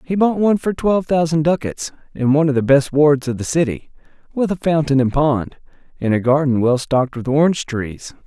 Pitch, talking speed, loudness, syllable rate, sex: 145 Hz, 210 wpm, -17 LUFS, 5.7 syllables/s, male